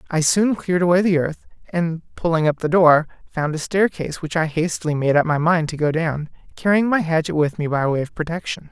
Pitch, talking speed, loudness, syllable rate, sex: 165 Hz, 225 wpm, -20 LUFS, 5.6 syllables/s, male